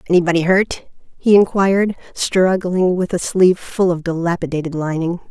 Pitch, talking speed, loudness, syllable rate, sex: 180 Hz, 135 wpm, -17 LUFS, 5.3 syllables/s, female